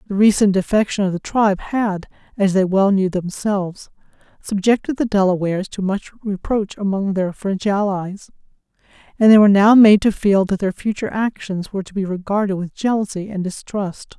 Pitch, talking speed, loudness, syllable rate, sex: 200 Hz, 175 wpm, -18 LUFS, 5.3 syllables/s, female